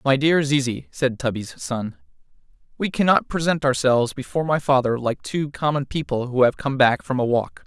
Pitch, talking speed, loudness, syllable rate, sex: 135 Hz, 190 wpm, -21 LUFS, 5.2 syllables/s, male